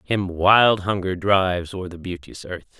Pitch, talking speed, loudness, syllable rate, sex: 95 Hz, 170 wpm, -20 LUFS, 4.7 syllables/s, male